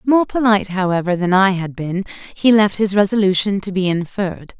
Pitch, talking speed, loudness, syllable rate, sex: 195 Hz, 185 wpm, -17 LUFS, 5.5 syllables/s, female